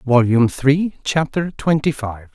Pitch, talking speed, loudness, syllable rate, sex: 135 Hz, 130 wpm, -18 LUFS, 4.3 syllables/s, male